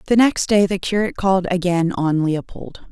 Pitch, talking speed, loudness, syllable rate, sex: 185 Hz, 185 wpm, -18 LUFS, 5.3 syllables/s, female